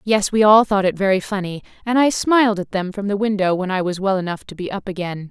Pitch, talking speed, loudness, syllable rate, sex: 200 Hz, 270 wpm, -18 LUFS, 6.0 syllables/s, female